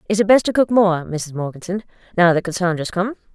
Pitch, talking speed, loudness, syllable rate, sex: 185 Hz, 235 wpm, -19 LUFS, 6.3 syllables/s, female